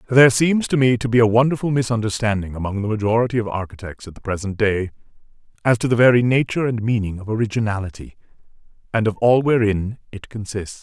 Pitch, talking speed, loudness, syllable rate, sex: 110 Hz, 185 wpm, -19 LUFS, 6.5 syllables/s, male